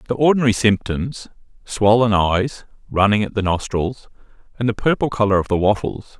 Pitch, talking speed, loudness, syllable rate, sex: 110 Hz, 145 wpm, -18 LUFS, 5.1 syllables/s, male